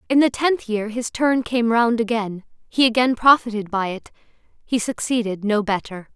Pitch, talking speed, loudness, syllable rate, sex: 230 Hz, 175 wpm, -20 LUFS, 4.8 syllables/s, female